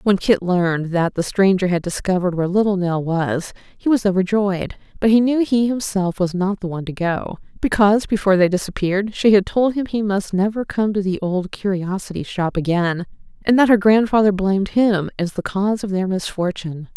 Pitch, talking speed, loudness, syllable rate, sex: 195 Hz, 200 wpm, -19 LUFS, 5.5 syllables/s, female